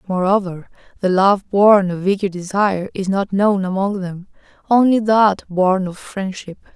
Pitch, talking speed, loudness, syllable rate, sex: 195 Hz, 150 wpm, -17 LUFS, 4.4 syllables/s, female